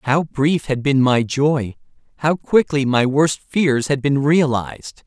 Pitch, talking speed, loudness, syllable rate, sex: 140 Hz, 165 wpm, -18 LUFS, 3.8 syllables/s, male